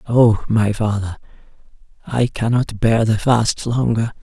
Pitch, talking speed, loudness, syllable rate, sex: 110 Hz, 130 wpm, -18 LUFS, 3.9 syllables/s, male